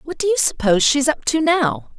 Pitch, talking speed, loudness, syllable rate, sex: 275 Hz, 240 wpm, -17 LUFS, 5.3 syllables/s, female